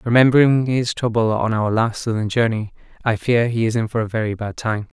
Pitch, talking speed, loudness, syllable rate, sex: 115 Hz, 215 wpm, -19 LUFS, 5.6 syllables/s, male